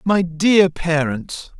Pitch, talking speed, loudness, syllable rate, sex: 170 Hz, 115 wpm, -17 LUFS, 2.8 syllables/s, male